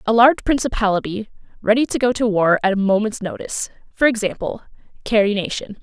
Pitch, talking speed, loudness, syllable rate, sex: 220 Hz, 165 wpm, -19 LUFS, 6.2 syllables/s, female